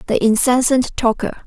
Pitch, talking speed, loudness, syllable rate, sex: 240 Hz, 125 wpm, -16 LUFS, 5.2 syllables/s, female